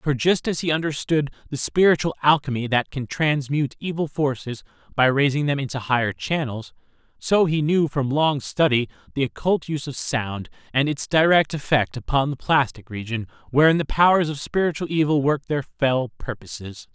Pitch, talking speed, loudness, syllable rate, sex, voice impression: 140 Hz, 170 wpm, -22 LUFS, 5.2 syllables/s, male, masculine, adult-like, tensed, slightly clear, intellectual, refreshing